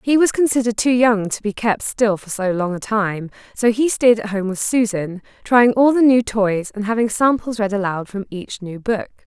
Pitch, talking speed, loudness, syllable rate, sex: 215 Hz, 225 wpm, -18 LUFS, 4.9 syllables/s, female